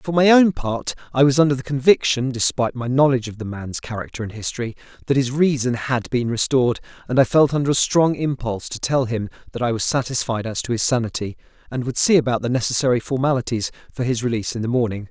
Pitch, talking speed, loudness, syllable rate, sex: 125 Hz, 220 wpm, -20 LUFS, 6.4 syllables/s, male